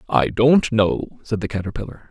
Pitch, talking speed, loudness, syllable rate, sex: 110 Hz, 170 wpm, -20 LUFS, 5.0 syllables/s, male